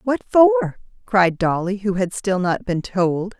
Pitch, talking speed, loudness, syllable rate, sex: 195 Hz, 175 wpm, -19 LUFS, 4.2 syllables/s, female